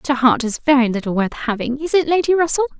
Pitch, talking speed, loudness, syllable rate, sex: 275 Hz, 260 wpm, -17 LUFS, 6.6 syllables/s, female